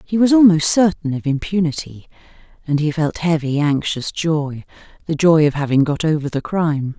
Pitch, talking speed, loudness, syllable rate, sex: 155 Hz, 170 wpm, -17 LUFS, 5.1 syllables/s, female